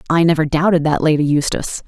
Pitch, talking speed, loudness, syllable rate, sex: 155 Hz, 190 wpm, -16 LUFS, 6.6 syllables/s, female